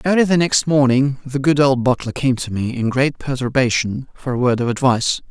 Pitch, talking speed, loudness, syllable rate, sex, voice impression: 130 Hz, 215 wpm, -17 LUFS, 5.4 syllables/s, male, masculine, adult-like, thick, slightly tensed, slightly powerful, soft, slightly raspy, intellectual, calm, slightly mature, slightly friendly, reassuring, wild, kind